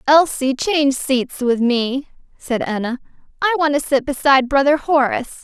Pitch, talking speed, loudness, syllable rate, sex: 275 Hz, 155 wpm, -17 LUFS, 5.0 syllables/s, female